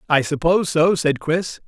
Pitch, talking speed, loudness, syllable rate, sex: 160 Hz, 180 wpm, -19 LUFS, 4.8 syllables/s, male